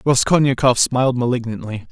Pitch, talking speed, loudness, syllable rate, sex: 125 Hz, 95 wpm, -17 LUFS, 5.6 syllables/s, male